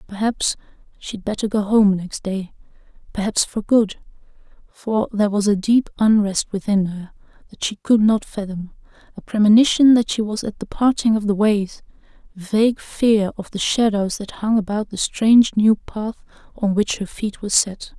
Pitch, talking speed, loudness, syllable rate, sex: 210 Hz, 170 wpm, -19 LUFS, 4.8 syllables/s, female